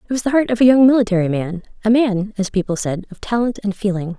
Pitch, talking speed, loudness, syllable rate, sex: 210 Hz, 260 wpm, -17 LUFS, 6.4 syllables/s, female